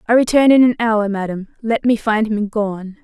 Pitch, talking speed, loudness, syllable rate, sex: 220 Hz, 220 wpm, -16 LUFS, 4.8 syllables/s, female